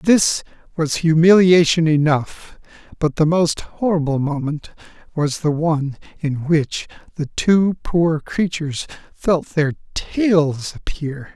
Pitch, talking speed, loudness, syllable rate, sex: 160 Hz, 115 wpm, -18 LUFS, 3.7 syllables/s, male